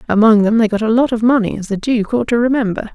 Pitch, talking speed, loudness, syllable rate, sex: 225 Hz, 265 wpm, -14 LUFS, 6.7 syllables/s, female